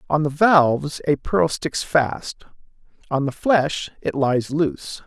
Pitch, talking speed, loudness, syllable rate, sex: 150 Hz, 155 wpm, -20 LUFS, 3.7 syllables/s, male